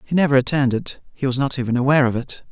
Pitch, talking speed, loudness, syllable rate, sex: 135 Hz, 240 wpm, -19 LUFS, 7.5 syllables/s, male